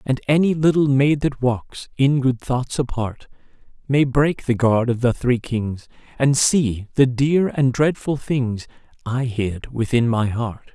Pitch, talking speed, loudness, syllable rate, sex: 130 Hz, 170 wpm, -20 LUFS, 3.8 syllables/s, male